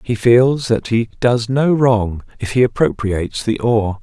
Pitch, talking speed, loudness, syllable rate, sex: 115 Hz, 180 wpm, -16 LUFS, 4.4 syllables/s, male